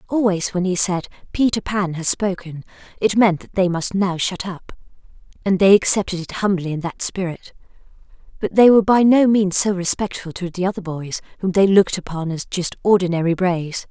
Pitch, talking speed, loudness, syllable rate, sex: 185 Hz, 190 wpm, -18 LUFS, 5.4 syllables/s, female